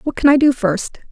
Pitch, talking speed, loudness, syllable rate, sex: 260 Hz, 270 wpm, -15 LUFS, 5.6 syllables/s, female